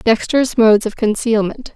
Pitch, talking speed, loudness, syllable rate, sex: 225 Hz, 135 wpm, -15 LUFS, 5.5 syllables/s, female